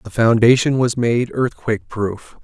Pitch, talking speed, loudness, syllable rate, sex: 120 Hz, 150 wpm, -17 LUFS, 4.5 syllables/s, male